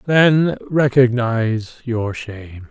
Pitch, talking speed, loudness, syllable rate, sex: 120 Hz, 90 wpm, -17 LUFS, 3.4 syllables/s, male